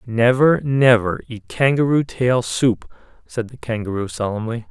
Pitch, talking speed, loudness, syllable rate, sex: 120 Hz, 130 wpm, -19 LUFS, 4.4 syllables/s, male